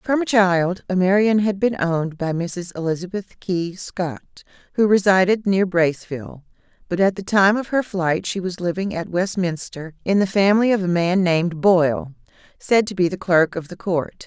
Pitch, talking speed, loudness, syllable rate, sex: 185 Hz, 185 wpm, -20 LUFS, 4.9 syllables/s, female